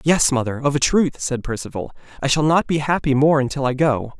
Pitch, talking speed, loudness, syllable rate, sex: 140 Hz, 230 wpm, -19 LUFS, 5.6 syllables/s, male